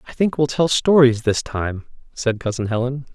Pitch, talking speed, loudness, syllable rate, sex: 130 Hz, 190 wpm, -19 LUFS, 4.9 syllables/s, male